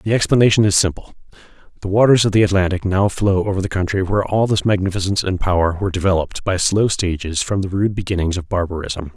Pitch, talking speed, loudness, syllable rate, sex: 95 Hz, 205 wpm, -17 LUFS, 6.5 syllables/s, male